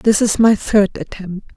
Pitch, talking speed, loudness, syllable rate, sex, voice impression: 205 Hz, 190 wpm, -14 LUFS, 4.1 syllables/s, female, feminine, adult-like, relaxed, slightly weak, slightly soft, halting, calm, friendly, reassuring, elegant, kind, modest